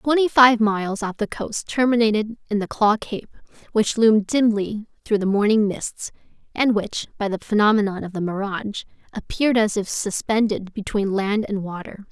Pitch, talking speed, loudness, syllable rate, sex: 215 Hz, 170 wpm, -21 LUFS, 5.1 syllables/s, female